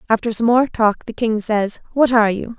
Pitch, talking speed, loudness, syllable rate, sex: 225 Hz, 230 wpm, -17 LUFS, 5.3 syllables/s, female